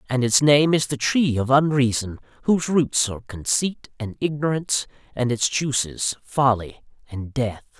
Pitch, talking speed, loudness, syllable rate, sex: 130 Hz, 155 wpm, -21 LUFS, 4.7 syllables/s, male